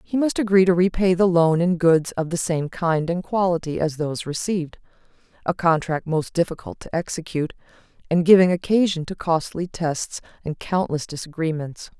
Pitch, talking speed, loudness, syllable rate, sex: 170 Hz, 165 wpm, -22 LUFS, 5.2 syllables/s, female